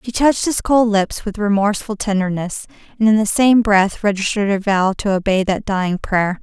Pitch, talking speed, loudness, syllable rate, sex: 205 Hz, 195 wpm, -17 LUFS, 5.3 syllables/s, female